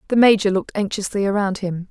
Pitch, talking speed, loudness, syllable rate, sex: 200 Hz, 190 wpm, -19 LUFS, 6.6 syllables/s, female